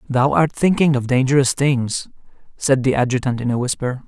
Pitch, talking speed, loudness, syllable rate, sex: 135 Hz, 175 wpm, -18 LUFS, 5.3 syllables/s, male